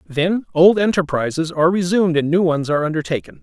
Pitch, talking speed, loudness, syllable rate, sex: 165 Hz, 175 wpm, -17 LUFS, 6.1 syllables/s, male